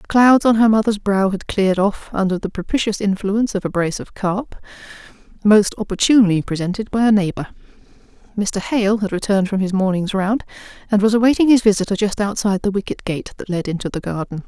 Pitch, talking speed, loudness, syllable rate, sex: 200 Hz, 195 wpm, -18 LUFS, 6.1 syllables/s, female